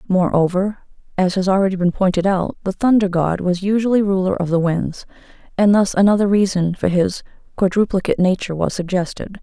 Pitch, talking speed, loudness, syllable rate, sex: 190 Hz, 165 wpm, -18 LUFS, 5.8 syllables/s, female